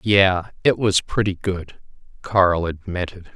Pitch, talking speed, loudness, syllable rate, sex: 95 Hz, 125 wpm, -20 LUFS, 3.8 syllables/s, male